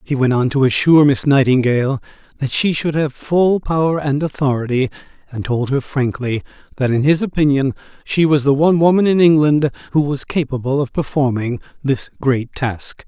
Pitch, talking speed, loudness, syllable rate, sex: 140 Hz, 175 wpm, -16 LUFS, 5.2 syllables/s, male